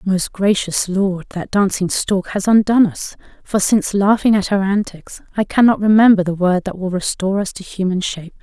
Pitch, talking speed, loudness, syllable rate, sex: 195 Hz, 190 wpm, -16 LUFS, 5.3 syllables/s, female